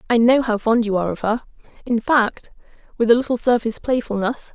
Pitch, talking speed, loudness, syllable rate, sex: 230 Hz, 200 wpm, -19 LUFS, 4.0 syllables/s, female